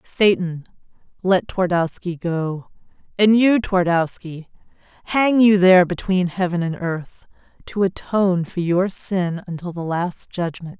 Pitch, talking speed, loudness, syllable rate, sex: 180 Hz, 130 wpm, -19 LUFS, 4.1 syllables/s, female